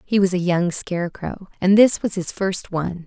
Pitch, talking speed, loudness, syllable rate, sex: 185 Hz, 215 wpm, -20 LUFS, 4.9 syllables/s, female